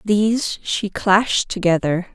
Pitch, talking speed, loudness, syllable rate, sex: 200 Hz, 110 wpm, -19 LUFS, 4.0 syllables/s, female